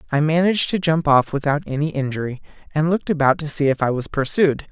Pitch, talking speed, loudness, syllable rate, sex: 150 Hz, 215 wpm, -20 LUFS, 6.3 syllables/s, male